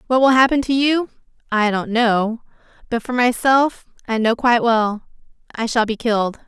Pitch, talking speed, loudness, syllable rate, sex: 235 Hz, 175 wpm, -18 LUFS, 5.0 syllables/s, female